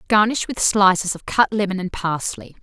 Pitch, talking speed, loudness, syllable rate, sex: 195 Hz, 185 wpm, -19 LUFS, 5.0 syllables/s, female